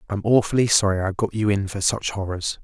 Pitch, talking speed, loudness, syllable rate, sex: 105 Hz, 230 wpm, -21 LUFS, 5.9 syllables/s, male